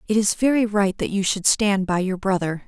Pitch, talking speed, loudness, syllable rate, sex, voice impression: 200 Hz, 245 wpm, -21 LUFS, 5.2 syllables/s, female, very feminine, slightly gender-neutral, adult-like, slightly middle-aged, slightly thin, tensed, slightly powerful, slightly dark, slightly soft, clear, slightly fluent, slightly cute, slightly cool, intellectual, refreshing, very sincere, calm, friendly, reassuring, slightly unique, elegant, sweet, slightly lively, slightly strict, slightly intense, slightly sharp